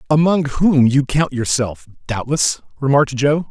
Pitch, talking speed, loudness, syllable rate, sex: 140 Hz, 135 wpm, -17 LUFS, 4.4 syllables/s, male